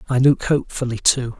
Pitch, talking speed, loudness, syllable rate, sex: 130 Hz, 175 wpm, -19 LUFS, 5.9 syllables/s, male